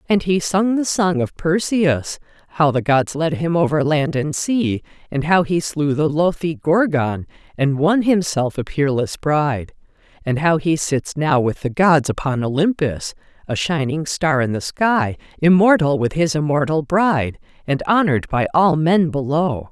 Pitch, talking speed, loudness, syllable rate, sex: 155 Hz, 170 wpm, -18 LUFS, 4.4 syllables/s, female